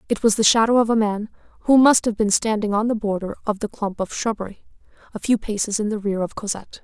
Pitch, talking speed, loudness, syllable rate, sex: 215 Hz, 245 wpm, -20 LUFS, 6.3 syllables/s, female